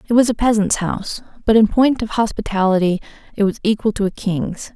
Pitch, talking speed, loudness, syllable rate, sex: 210 Hz, 200 wpm, -18 LUFS, 5.8 syllables/s, female